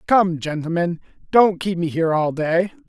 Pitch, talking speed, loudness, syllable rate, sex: 175 Hz, 165 wpm, -20 LUFS, 4.8 syllables/s, male